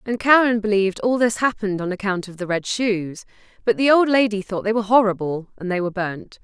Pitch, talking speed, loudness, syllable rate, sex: 210 Hz, 225 wpm, -20 LUFS, 6.0 syllables/s, female